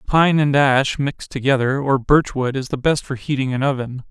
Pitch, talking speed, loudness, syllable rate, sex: 135 Hz, 220 wpm, -18 LUFS, 5.1 syllables/s, male